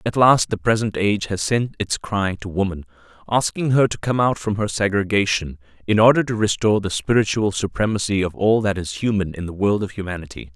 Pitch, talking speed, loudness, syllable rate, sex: 100 Hz, 205 wpm, -20 LUFS, 5.7 syllables/s, male